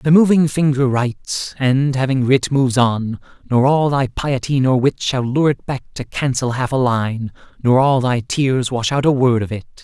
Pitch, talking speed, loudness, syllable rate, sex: 130 Hz, 205 wpm, -17 LUFS, 4.6 syllables/s, male